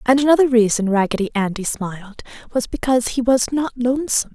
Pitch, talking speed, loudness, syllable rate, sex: 240 Hz, 165 wpm, -18 LUFS, 6.2 syllables/s, female